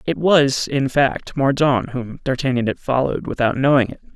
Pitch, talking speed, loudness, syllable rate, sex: 135 Hz, 175 wpm, -19 LUFS, 4.9 syllables/s, male